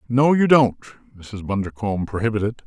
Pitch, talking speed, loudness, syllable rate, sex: 110 Hz, 135 wpm, -20 LUFS, 5.8 syllables/s, male